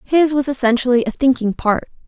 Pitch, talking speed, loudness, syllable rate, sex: 260 Hz, 175 wpm, -17 LUFS, 5.6 syllables/s, female